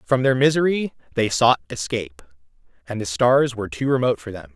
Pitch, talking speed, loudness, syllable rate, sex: 115 Hz, 185 wpm, -20 LUFS, 6.0 syllables/s, male